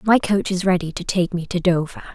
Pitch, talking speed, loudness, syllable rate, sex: 180 Hz, 250 wpm, -20 LUFS, 5.6 syllables/s, female